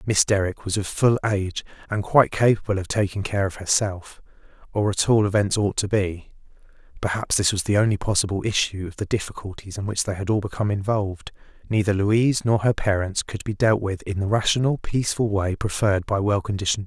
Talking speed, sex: 205 wpm, male